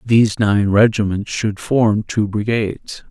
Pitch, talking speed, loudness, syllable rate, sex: 105 Hz, 135 wpm, -17 LUFS, 4.0 syllables/s, male